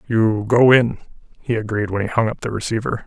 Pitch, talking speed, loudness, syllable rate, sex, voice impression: 110 Hz, 215 wpm, -18 LUFS, 5.6 syllables/s, male, very masculine, middle-aged, thick, slightly muffled, fluent, unique, slightly intense